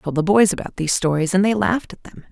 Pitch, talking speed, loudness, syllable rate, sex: 185 Hz, 310 wpm, -19 LUFS, 7.2 syllables/s, female